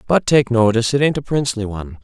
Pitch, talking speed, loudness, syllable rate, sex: 120 Hz, 235 wpm, -17 LUFS, 7.0 syllables/s, male